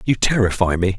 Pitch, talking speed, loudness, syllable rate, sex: 100 Hz, 180 wpm, -18 LUFS, 5.6 syllables/s, male